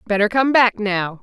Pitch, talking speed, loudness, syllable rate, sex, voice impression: 215 Hz, 195 wpm, -17 LUFS, 4.5 syllables/s, female, very feminine, very adult-like, middle-aged, very thin, tensed, slightly powerful, bright, very hard, very clear, very fluent, cool, slightly intellectual, slightly refreshing, sincere, slightly calm, slightly friendly, slightly reassuring, unique, slightly elegant, wild, slightly sweet, kind, very modest